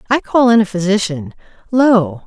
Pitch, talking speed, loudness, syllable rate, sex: 205 Hz, 160 wpm, -14 LUFS, 4.7 syllables/s, female